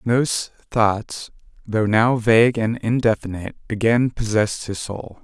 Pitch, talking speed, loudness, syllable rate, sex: 110 Hz, 140 wpm, -20 LUFS, 4.7 syllables/s, male